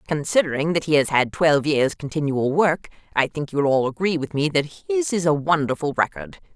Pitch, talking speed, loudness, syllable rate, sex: 155 Hz, 200 wpm, -21 LUFS, 5.3 syllables/s, female